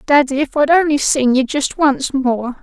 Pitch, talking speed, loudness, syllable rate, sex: 275 Hz, 205 wpm, -15 LUFS, 4.4 syllables/s, female